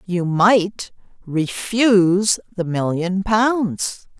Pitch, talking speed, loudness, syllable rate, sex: 195 Hz, 85 wpm, -18 LUFS, 2.5 syllables/s, female